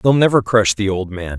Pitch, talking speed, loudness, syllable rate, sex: 105 Hz, 260 wpm, -16 LUFS, 5.2 syllables/s, male